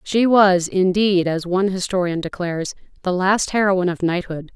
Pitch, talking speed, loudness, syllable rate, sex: 185 Hz, 160 wpm, -19 LUFS, 5.1 syllables/s, female